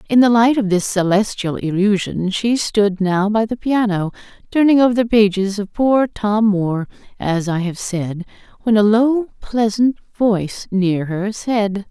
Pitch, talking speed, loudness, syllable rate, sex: 210 Hz, 165 wpm, -17 LUFS, 4.3 syllables/s, female